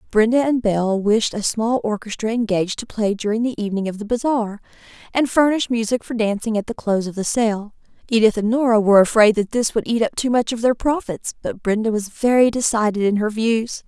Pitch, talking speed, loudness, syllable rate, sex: 225 Hz, 215 wpm, -19 LUFS, 5.8 syllables/s, female